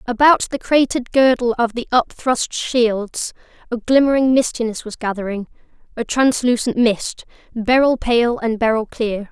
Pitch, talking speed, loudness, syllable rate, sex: 240 Hz, 135 wpm, -18 LUFS, 4.5 syllables/s, female